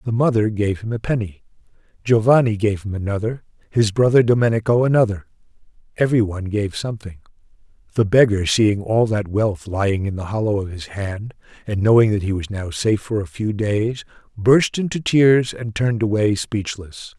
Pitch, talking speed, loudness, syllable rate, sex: 105 Hz, 170 wpm, -19 LUFS, 5.3 syllables/s, male